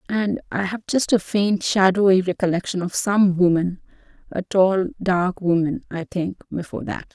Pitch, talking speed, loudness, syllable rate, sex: 190 Hz, 160 wpm, -21 LUFS, 4.6 syllables/s, female